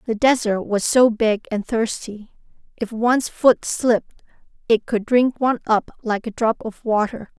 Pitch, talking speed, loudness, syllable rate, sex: 225 Hz, 170 wpm, -20 LUFS, 4.5 syllables/s, female